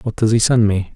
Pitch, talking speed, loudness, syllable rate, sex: 110 Hz, 315 wpm, -15 LUFS, 5.5 syllables/s, male